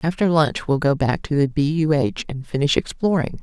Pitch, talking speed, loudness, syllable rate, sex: 150 Hz, 230 wpm, -20 LUFS, 5.2 syllables/s, female